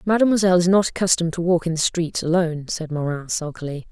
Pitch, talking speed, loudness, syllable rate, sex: 170 Hz, 200 wpm, -20 LUFS, 6.6 syllables/s, female